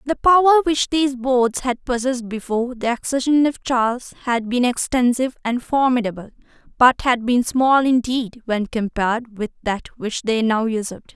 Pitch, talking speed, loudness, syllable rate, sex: 245 Hz, 160 wpm, -19 LUFS, 5.1 syllables/s, female